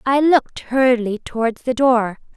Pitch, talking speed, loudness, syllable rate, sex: 245 Hz, 155 wpm, -18 LUFS, 4.8 syllables/s, female